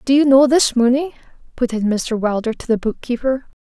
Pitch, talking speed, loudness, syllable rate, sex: 245 Hz, 200 wpm, -17 LUFS, 5.4 syllables/s, female